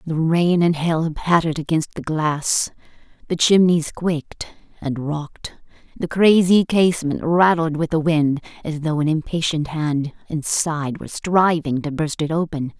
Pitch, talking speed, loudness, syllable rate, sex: 160 Hz, 150 wpm, -20 LUFS, 4.5 syllables/s, female